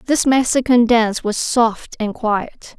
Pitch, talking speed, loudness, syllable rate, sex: 235 Hz, 150 wpm, -17 LUFS, 3.7 syllables/s, female